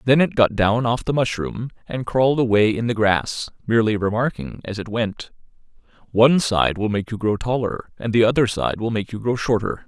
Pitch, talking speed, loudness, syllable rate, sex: 115 Hz, 205 wpm, -20 LUFS, 5.3 syllables/s, male